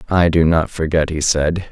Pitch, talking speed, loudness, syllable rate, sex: 80 Hz, 210 wpm, -16 LUFS, 4.7 syllables/s, male